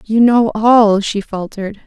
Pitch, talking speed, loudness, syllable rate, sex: 215 Hz, 160 wpm, -13 LUFS, 4.1 syllables/s, female